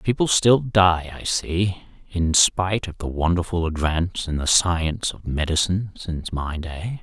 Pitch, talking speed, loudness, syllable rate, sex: 90 Hz, 160 wpm, -21 LUFS, 4.6 syllables/s, male